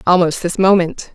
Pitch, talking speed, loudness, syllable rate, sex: 180 Hz, 155 wpm, -15 LUFS, 5.0 syllables/s, female